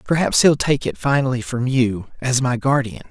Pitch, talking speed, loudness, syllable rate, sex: 130 Hz, 175 wpm, -19 LUFS, 4.9 syllables/s, male